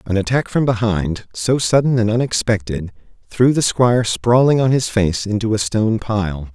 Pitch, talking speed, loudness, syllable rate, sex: 115 Hz, 175 wpm, -17 LUFS, 4.8 syllables/s, male